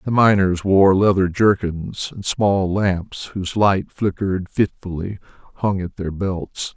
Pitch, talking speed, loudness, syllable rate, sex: 95 Hz, 140 wpm, -19 LUFS, 3.9 syllables/s, male